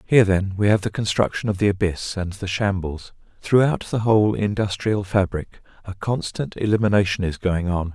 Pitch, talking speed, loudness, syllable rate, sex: 100 Hz, 175 wpm, -21 LUFS, 5.2 syllables/s, male